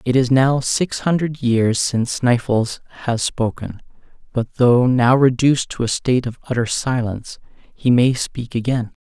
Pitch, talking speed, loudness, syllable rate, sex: 125 Hz, 160 wpm, -18 LUFS, 4.4 syllables/s, male